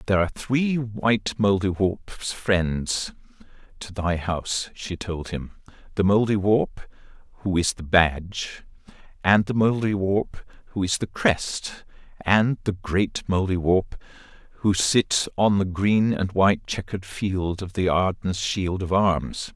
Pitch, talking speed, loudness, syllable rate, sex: 95 Hz, 130 wpm, -23 LUFS, 4.0 syllables/s, male